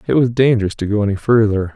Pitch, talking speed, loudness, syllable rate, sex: 110 Hz, 240 wpm, -16 LUFS, 6.9 syllables/s, male